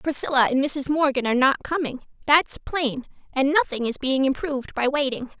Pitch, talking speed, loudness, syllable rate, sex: 275 Hz, 180 wpm, -22 LUFS, 5.4 syllables/s, female